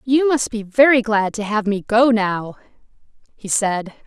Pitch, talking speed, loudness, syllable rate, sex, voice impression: 220 Hz, 175 wpm, -18 LUFS, 4.2 syllables/s, female, very feminine, young, very thin, tensed, powerful, bright, very hard, very clear, very fluent, cute, slightly cool, intellectual, very refreshing, sincere, calm, friendly, very reassuring, unique, slightly elegant, wild, slightly sweet, lively, slightly strict, intense, slightly sharp, light